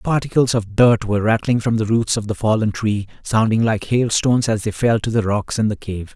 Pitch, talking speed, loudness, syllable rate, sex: 110 Hz, 235 wpm, -18 LUFS, 5.4 syllables/s, male